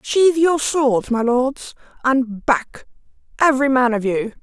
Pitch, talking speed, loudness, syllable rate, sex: 260 Hz, 150 wpm, -18 LUFS, 4.1 syllables/s, female